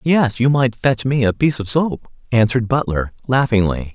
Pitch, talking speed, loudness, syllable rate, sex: 120 Hz, 180 wpm, -17 LUFS, 5.1 syllables/s, male